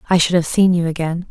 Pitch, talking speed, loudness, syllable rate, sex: 170 Hz, 275 wpm, -16 LUFS, 6.4 syllables/s, female